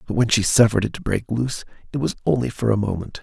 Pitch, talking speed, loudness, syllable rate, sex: 110 Hz, 260 wpm, -21 LUFS, 7.1 syllables/s, male